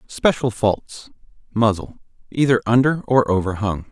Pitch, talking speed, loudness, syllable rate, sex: 115 Hz, 105 wpm, -19 LUFS, 4.4 syllables/s, male